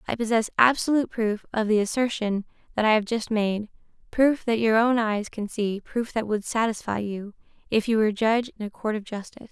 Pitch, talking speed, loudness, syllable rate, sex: 220 Hz, 195 wpm, -25 LUFS, 5.6 syllables/s, female